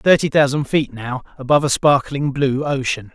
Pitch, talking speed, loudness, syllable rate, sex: 140 Hz, 170 wpm, -18 LUFS, 5.1 syllables/s, male